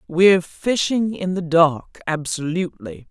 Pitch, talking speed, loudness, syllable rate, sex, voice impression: 170 Hz, 115 wpm, -20 LUFS, 4.2 syllables/s, female, feminine, middle-aged, tensed, powerful, bright, clear, fluent, intellectual, friendly, slightly elegant, lively, sharp, light